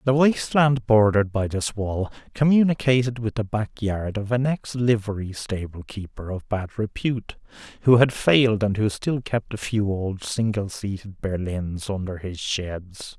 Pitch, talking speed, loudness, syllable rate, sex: 110 Hz, 170 wpm, -23 LUFS, 4.5 syllables/s, male